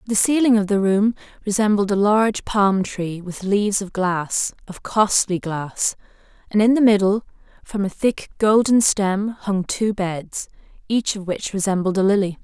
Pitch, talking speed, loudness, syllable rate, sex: 200 Hz, 170 wpm, -20 LUFS, 4.3 syllables/s, female